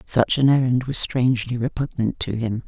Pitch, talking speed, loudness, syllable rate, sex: 125 Hz, 180 wpm, -21 LUFS, 5.1 syllables/s, female